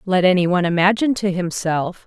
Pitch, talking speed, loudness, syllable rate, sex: 185 Hz, 145 wpm, -18 LUFS, 5.6 syllables/s, female